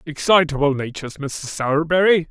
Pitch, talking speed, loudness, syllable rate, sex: 155 Hz, 105 wpm, -19 LUFS, 5.5 syllables/s, male